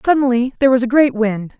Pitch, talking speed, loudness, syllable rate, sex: 250 Hz, 225 wpm, -15 LUFS, 6.4 syllables/s, female